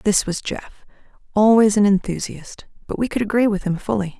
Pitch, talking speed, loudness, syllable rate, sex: 205 Hz, 185 wpm, -19 LUFS, 5.7 syllables/s, female